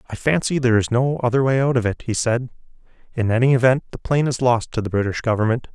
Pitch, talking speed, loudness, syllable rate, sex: 120 Hz, 240 wpm, -20 LUFS, 6.7 syllables/s, male